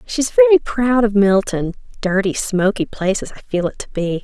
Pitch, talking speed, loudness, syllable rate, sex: 210 Hz, 210 wpm, -17 LUFS, 5.2 syllables/s, female